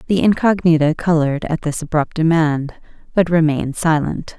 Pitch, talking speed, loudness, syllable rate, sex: 160 Hz, 135 wpm, -17 LUFS, 5.2 syllables/s, female